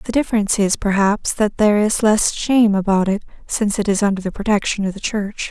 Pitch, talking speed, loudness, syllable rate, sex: 205 Hz, 220 wpm, -18 LUFS, 5.9 syllables/s, female